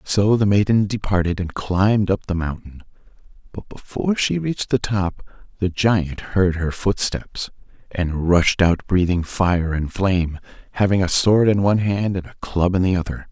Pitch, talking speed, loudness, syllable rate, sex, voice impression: 95 Hz, 175 wpm, -20 LUFS, 4.6 syllables/s, male, very masculine, very adult-like, middle-aged, very thick, slightly relaxed, slightly weak, slightly bright, very soft, muffled, fluent, very cool, very intellectual, refreshing, very sincere, very calm, mature, very friendly, very reassuring, unique, elegant, wild, very sweet, slightly lively, very kind, modest